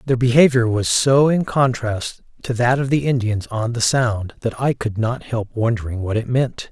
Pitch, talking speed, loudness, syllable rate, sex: 120 Hz, 205 wpm, -19 LUFS, 4.6 syllables/s, male